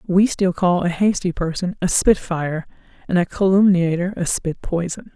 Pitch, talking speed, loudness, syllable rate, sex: 180 Hz, 165 wpm, -19 LUFS, 4.8 syllables/s, female